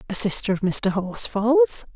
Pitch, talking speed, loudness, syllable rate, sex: 205 Hz, 155 wpm, -20 LUFS, 4.1 syllables/s, female